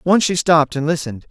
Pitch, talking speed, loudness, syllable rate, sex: 160 Hz, 230 wpm, -17 LUFS, 6.8 syllables/s, male